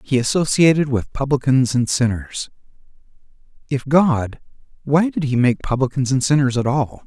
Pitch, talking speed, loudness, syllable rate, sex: 135 Hz, 145 wpm, -18 LUFS, 4.9 syllables/s, male